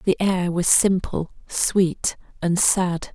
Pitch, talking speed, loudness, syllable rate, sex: 180 Hz, 135 wpm, -21 LUFS, 3.1 syllables/s, female